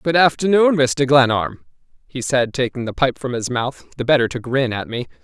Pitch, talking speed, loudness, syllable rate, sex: 130 Hz, 205 wpm, -18 LUFS, 5.1 syllables/s, male